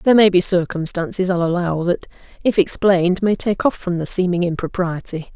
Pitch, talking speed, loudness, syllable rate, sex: 180 Hz, 180 wpm, -18 LUFS, 5.6 syllables/s, female